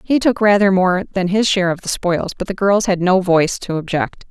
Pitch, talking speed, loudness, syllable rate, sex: 190 Hz, 250 wpm, -16 LUFS, 5.5 syllables/s, female